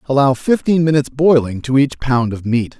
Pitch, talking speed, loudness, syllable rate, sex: 135 Hz, 195 wpm, -15 LUFS, 5.3 syllables/s, male